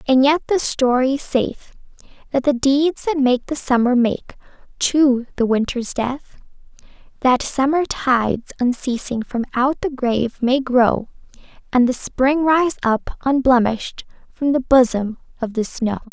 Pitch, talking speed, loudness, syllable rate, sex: 260 Hz, 145 wpm, -18 LUFS, 4.0 syllables/s, female